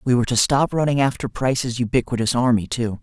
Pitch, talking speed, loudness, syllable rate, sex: 125 Hz, 200 wpm, -20 LUFS, 6.1 syllables/s, male